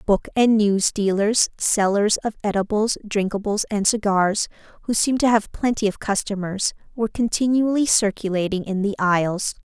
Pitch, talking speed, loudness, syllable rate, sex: 210 Hz, 145 wpm, -21 LUFS, 5.0 syllables/s, female